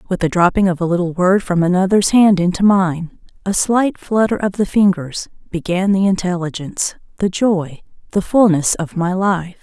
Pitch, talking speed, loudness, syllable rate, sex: 185 Hz, 175 wpm, -16 LUFS, 4.9 syllables/s, female